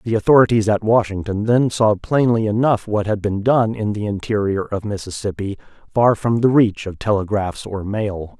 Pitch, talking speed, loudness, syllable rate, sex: 105 Hz, 180 wpm, -18 LUFS, 4.9 syllables/s, male